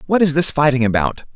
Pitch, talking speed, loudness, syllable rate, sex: 145 Hz, 220 wpm, -16 LUFS, 6.2 syllables/s, male